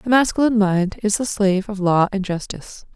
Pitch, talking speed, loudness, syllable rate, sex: 205 Hz, 205 wpm, -19 LUFS, 5.8 syllables/s, female